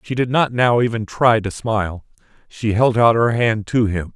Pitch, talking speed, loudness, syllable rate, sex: 115 Hz, 215 wpm, -17 LUFS, 4.7 syllables/s, male